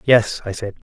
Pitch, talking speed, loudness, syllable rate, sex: 110 Hz, 195 wpm, -20 LUFS, 4.7 syllables/s, male